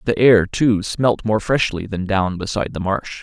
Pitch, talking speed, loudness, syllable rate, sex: 105 Hz, 205 wpm, -18 LUFS, 4.5 syllables/s, male